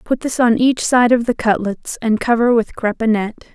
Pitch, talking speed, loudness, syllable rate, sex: 230 Hz, 205 wpm, -16 LUFS, 5.2 syllables/s, female